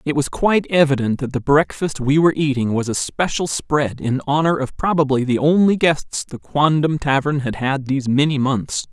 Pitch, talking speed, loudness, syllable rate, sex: 145 Hz, 195 wpm, -18 LUFS, 5.1 syllables/s, male